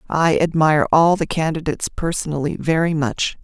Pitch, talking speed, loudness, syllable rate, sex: 155 Hz, 140 wpm, -18 LUFS, 5.3 syllables/s, female